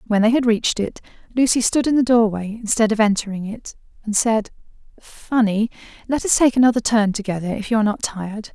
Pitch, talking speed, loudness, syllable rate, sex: 220 Hz, 195 wpm, -19 LUFS, 5.9 syllables/s, female